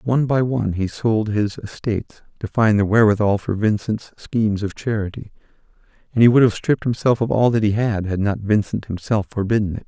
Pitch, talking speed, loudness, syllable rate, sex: 110 Hz, 200 wpm, -19 LUFS, 5.8 syllables/s, male